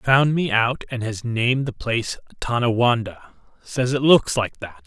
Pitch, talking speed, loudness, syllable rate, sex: 120 Hz, 160 wpm, -21 LUFS, 4.5 syllables/s, male